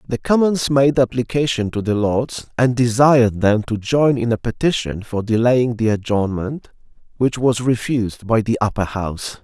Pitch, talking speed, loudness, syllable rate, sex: 115 Hz, 165 wpm, -18 LUFS, 4.7 syllables/s, male